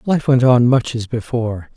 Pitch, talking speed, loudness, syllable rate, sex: 120 Hz, 205 wpm, -16 LUFS, 4.9 syllables/s, male